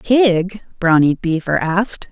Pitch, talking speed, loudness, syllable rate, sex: 185 Hz, 115 wpm, -16 LUFS, 3.9 syllables/s, female